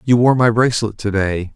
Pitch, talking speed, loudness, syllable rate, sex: 110 Hz, 230 wpm, -16 LUFS, 5.5 syllables/s, male